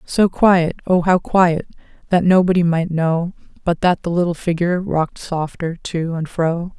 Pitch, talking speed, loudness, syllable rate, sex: 175 Hz, 170 wpm, -18 LUFS, 4.4 syllables/s, female